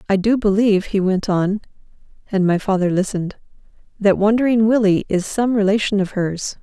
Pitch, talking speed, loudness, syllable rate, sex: 200 Hz, 165 wpm, -18 LUFS, 5.5 syllables/s, female